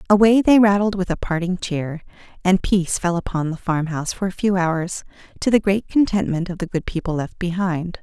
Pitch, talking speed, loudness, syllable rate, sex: 185 Hz, 210 wpm, -20 LUFS, 5.4 syllables/s, female